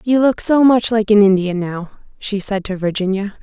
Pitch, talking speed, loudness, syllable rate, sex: 205 Hz, 210 wpm, -16 LUFS, 5.0 syllables/s, female